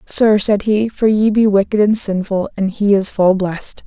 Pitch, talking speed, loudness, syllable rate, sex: 205 Hz, 215 wpm, -15 LUFS, 4.6 syllables/s, female